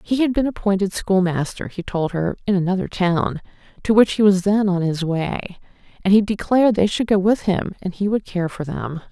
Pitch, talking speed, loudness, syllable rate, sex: 190 Hz, 215 wpm, -20 LUFS, 5.2 syllables/s, female